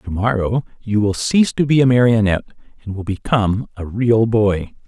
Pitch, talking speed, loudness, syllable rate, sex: 110 Hz, 170 wpm, -17 LUFS, 5.4 syllables/s, male